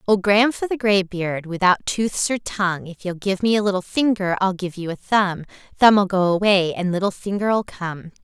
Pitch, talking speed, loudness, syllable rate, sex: 190 Hz, 190 wpm, -20 LUFS, 4.6 syllables/s, female